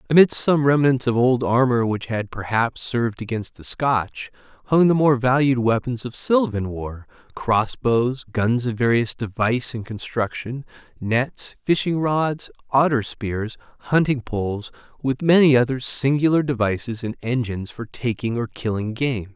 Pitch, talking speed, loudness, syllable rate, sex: 125 Hz, 150 wpm, -21 LUFS, 4.4 syllables/s, male